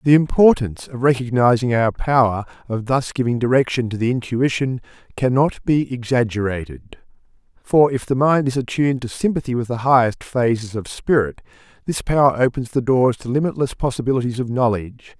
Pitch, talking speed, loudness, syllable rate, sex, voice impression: 125 Hz, 160 wpm, -19 LUFS, 5.5 syllables/s, male, masculine, adult-like, slightly muffled, slightly cool, slightly refreshing, sincere, slightly kind